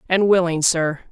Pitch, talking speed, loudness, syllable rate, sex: 175 Hz, 160 wpm, -18 LUFS, 4.7 syllables/s, female